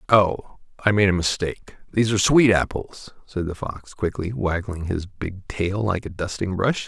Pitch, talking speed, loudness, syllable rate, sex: 95 Hz, 185 wpm, -23 LUFS, 4.7 syllables/s, male